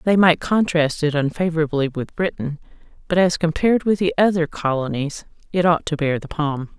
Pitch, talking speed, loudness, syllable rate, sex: 160 Hz, 175 wpm, -20 LUFS, 5.3 syllables/s, female